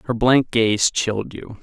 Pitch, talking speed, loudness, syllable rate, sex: 115 Hz, 185 wpm, -19 LUFS, 4.1 syllables/s, male